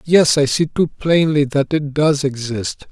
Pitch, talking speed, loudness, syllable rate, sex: 145 Hz, 185 wpm, -17 LUFS, 4.2 syllables/s, male